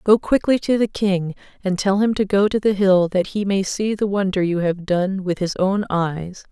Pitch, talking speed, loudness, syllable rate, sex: 195 Hz, 240 wpm, -19 LUFS, 4.6 syllables/s, female